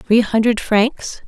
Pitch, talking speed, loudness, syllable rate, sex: 225 Hz, 140 wpm, -16 LUFS, 3.3 syllables/s, female